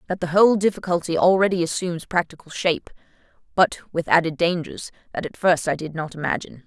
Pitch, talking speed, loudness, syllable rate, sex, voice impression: 170 Hz, 170 wpm, -22 LUFS, 6.4 syllables/s, female, feminine, slightly gender-neutral, adult-like, slightly middle-aged, slightly thin, tensed, slightly powerful, slightly dark, hard, clear, fluent, cool, intellectual, slightly refreshing, sincere, calm, slightly friendly, slightly reassuring, unique, slightly elegant, wild, slightly sweet, slightly lively, slightly strict, slightly intense, sharp, slightly light